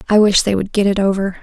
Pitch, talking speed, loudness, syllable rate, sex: 200 Hz, 295 wpm, -15 LUFS, 6.5 syllables/s, female